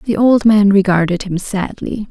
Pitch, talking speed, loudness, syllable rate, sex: 200 Hz, 170 wpm, -14 LUFS, 4.6 syllables/s, female